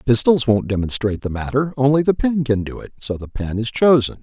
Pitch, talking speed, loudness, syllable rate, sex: 120 Hz, 225 wpm, -18 LUFS, 5.7 syllables/s, male